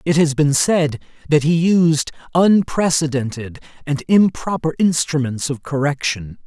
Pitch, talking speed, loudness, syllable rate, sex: 150 Hz, 120 wpm, -17 LUFS, 4.2 syllables/s, male